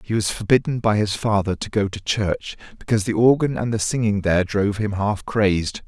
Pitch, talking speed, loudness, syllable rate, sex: 105 Hz, 215 wpm, -21 LUFS, 5.6 syllables/s, male